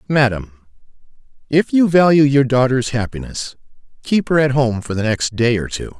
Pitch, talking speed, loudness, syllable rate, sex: 130 Hz, 160 wpm, -16 LUFS, 5.0 syllables/s, male